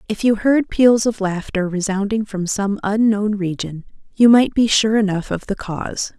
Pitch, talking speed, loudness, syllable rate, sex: 210 Hz, 185 wpm, -18 LUFS, 4.6 syllables/s, female